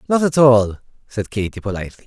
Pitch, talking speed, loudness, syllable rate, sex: 115 Hz, 175 wpm, -17 LUFS, 6.2 syllables/s, male